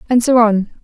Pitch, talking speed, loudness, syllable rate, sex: 230 Hz, 215 wpm, -13 LUFS, 5.4 syllables/s, female